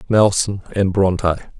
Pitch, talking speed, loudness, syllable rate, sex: 95 Hz, 115 wpm, -18 LUFS, 4.9 syllables/s, male